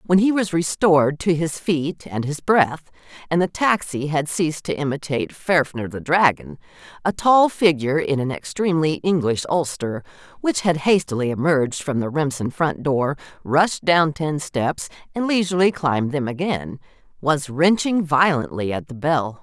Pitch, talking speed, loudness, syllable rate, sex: 155 Hz, 160 wpm, -20 LUFS, 3.7 syllables/s, female